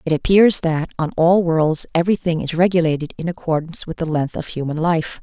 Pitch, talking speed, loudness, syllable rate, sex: 165 Hz, 195 wpm, -18 LUFS, 5.8 syllables/s, female